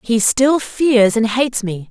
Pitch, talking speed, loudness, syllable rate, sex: 235 Hz, 190 wpm, -15 LUFS, 3.9 syllables/s, female